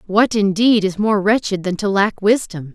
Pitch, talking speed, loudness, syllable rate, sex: 205 Hz, 195 wpm, -16 LUFS, 4.6 syllables/s, female